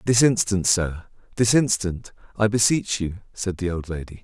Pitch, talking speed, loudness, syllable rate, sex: 100 Hz, 155 wpm, -22 LUFS, 4.6 syllables/s, male